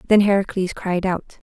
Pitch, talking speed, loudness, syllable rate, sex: 190 Hz, 155 wpm, -20 LUFS, 5.0 syllables/s, female